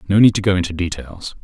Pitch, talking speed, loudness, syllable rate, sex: 95 Hz, 250 wpm, -17 LUFS, 6.6 syllables/s, male